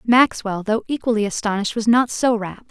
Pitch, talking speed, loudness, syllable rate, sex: 225 Hz, 175 wpm, -19 LUFS, 5.5 syllables/s, female